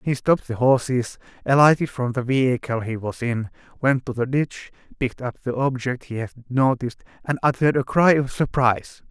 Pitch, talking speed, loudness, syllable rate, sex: 125 Hz, 185 wpm, -22 LUFS, 5.4 syllables/s, male